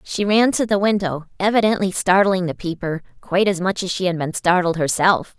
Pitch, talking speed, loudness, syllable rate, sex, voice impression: 185 Hz, 200 wpm, -19 LUFS, 5.4 syllables/s, female, very feminine, very adult-like, middle-aged, slightly thin, slightly tensed, slightly powerful, slightly bright, slightly soft, slightly clear, fluent, slightly raspy, slightly cute, intellectual, slightly refreshing, slightly sincere, calm, slightly friendly, slightly reassuring, very unique, elegant, wild, slightly sweet, lively, strict, slightly sharp, light